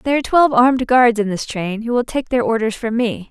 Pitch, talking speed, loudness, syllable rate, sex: 235 Hz, 270 wpm, -16 LUFS, 6.3 syllables/s, female